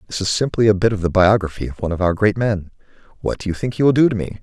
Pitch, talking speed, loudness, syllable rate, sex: 100 Hz, 310 wpm, -18 LUFS, 7.2 syllables/s, male